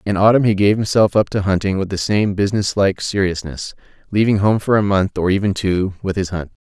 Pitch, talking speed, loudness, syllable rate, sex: 100 Hz, 215 wpm, -17 LUFS, 5.7 syllables/s, male